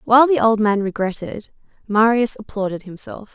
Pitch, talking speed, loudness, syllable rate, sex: 220 Hz, 145 wpm, -18 LUFS, 5.2 syllables/s, female